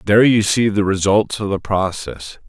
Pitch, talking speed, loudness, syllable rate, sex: 100 Hz, 195 wpm, -17 LUFS, 4.8 syllables/s, male